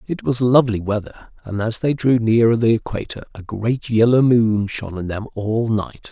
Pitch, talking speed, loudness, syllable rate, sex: 115 Hz, 195 wpm, -18 LUFS, 4.8 syllables/s, male